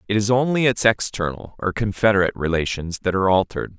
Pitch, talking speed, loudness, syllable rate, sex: 100 Hz, 175 wpm, -20 LUFS, 6.5 syllables/s, male